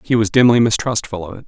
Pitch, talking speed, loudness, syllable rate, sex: 110 Hz, 245 wpm, -15 LUFS, 6.6 syllables/s, male